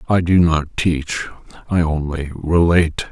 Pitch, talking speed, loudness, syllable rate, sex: 80 Hz, 135 wpm, -18 LUFS, 4.2 syllables/s, male